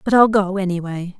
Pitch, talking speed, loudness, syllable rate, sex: 190 Hz, 200 wpm, -18 LUFS, 5.5 syllables/s, female